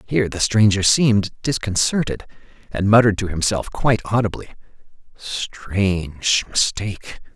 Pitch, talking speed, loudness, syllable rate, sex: 105 Hz, 105 wpm, -19 LUFS, 4.7 syllables/s, male